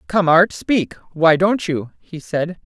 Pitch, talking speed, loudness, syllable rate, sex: 175 Hz, 170 wpm, -17 LUFS, 3.6 syllables/s, female